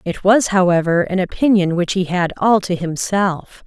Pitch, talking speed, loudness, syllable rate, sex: 185 Hz, 180 wpm, -16 LUFS, 4.6 syllables/s, female